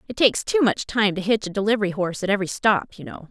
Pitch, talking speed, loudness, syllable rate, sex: 205 Hz, 270 wpm, -21 LUFS, 7.2 syllables/s, female